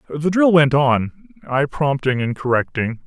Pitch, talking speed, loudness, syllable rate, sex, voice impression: 145 Hz, 155 wpm, -18 LUFS, 4.4 syllables/s, male, very masculine, slightly old, thick, slightly tensed, very powerful, bright, soft, muffled, fluent, slightly raspy, slightly cool, intellectual, refreshing, slightly sincere, calm, very mature, friendly, very reassuring, unique, slightly elegant, very wild, slightly sweet, lively, kind, slightly intense